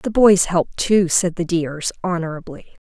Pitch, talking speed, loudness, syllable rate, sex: 175 Hz, 165 wpm, -18 LUFS, 4.7 syllables/s, female